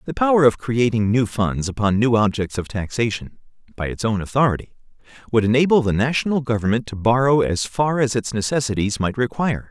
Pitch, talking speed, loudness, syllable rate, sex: 120 Hz, 180 wpm, -20 LUFS, 5.8 syllables/s, male